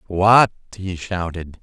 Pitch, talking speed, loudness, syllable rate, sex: 95 Hz, 110 wpm, -18 LUFS, 3.3 syllables/s, male